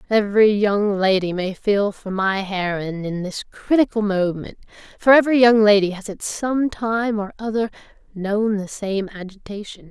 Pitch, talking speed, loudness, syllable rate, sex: 205 Hz, 155 wpm, -19 LUFS, 4.7 syllables/s, female